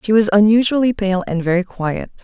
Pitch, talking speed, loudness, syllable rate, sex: 205 Hz, 190 wpm, -16 LUFS, 5.5 syllables/s, female